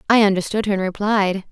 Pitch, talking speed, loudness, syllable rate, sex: 200 Hz, 200 wpm, -19 LUFS, 6.1 syllables/s, female